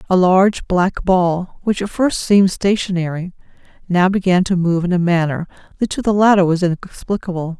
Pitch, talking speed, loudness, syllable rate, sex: 185 Hz, 175 wpm, -16 LUFS, 5.3 syllables/s, female